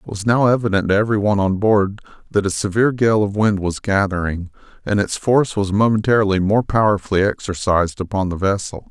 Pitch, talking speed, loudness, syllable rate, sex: 100 Hz, 190 wpm, -18 LUFS, 6.2 syllables/s, male